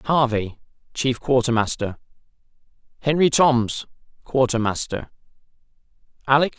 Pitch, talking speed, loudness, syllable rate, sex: 125 Hz, 65 wpm, -21 LUFS, 4.6 syllables/s, male